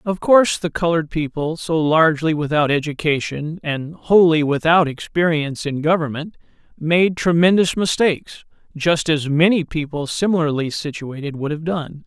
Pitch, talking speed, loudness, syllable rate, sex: 160 Hz, 135 wpm, -18 LUFS, 4.9 syllables/s, male